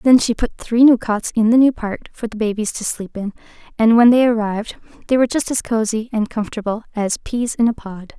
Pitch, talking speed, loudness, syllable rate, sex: 225 Hz, 235 wpm, -17 LUFS, 5.6 syllables/s, female